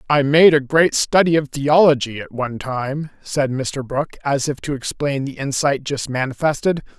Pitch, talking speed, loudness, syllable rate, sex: 140 Hz, 180 wpm, -18 LUFS, 4.8 syllables/s, male